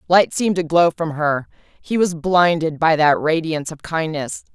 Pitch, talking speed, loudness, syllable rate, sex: 160 Hz, 185 wpm, -18 LUFS, 4.9 syllables/s, female